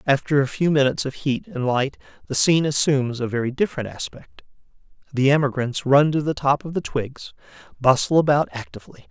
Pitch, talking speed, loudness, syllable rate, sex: 140 Hz, 180 wpm, -21 LUFS, 5.8 syllables/s, male